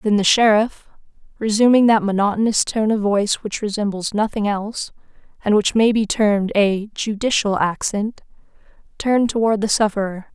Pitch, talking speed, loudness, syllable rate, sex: 210 Hz, 145 wpm, -18 LUFS, 5.2 syllables/s, female